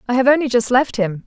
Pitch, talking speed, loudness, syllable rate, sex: 245 Hz, 285 wpm, -16 LUFS, 6.3 syllables/s, female